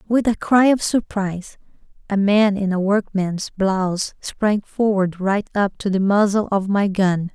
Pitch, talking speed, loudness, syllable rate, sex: 200 Hz, 170 wpm, -19 LUFS, 4.1 syllables/s, female